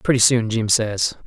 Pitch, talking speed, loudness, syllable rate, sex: 115 Hz, 190 wpm, -18 LUFS, 4.5 syllables/s, male